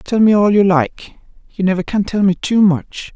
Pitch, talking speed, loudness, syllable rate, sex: 200 Hz, 230 wpm, -15 LUFS, 4.7 syllables/s, female